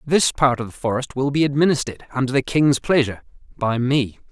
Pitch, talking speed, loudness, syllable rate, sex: 130 Hz, 195 wpm, -20 LUFS, 5.9 syllables/s, male